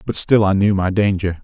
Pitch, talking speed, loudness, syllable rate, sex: 100 Hz, 250 wpm, -16 LUFS, 5.3 syllables/s, male